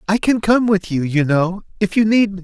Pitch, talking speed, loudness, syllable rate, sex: 195 Hz, 270 wpm, -17 LUFS, 5.2 syllables/s, male